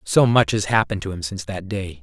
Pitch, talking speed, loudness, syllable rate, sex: 100 Hz, 265 wpm, -21 LUFS, 6.2 syllables/s, male